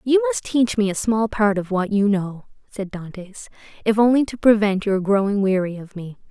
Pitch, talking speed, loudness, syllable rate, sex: 200 Hz, 210 wpm, -20 LUFS, 5.2 syllables/s, female